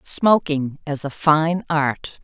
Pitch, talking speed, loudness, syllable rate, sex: 150 Hz, 135 wpm, -20 LUFS, 3.0 syllables/s, female